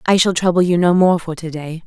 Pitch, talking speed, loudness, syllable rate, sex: 170 Hz, 290 wpm, -16 LUFS, 5.8 syllables/s, female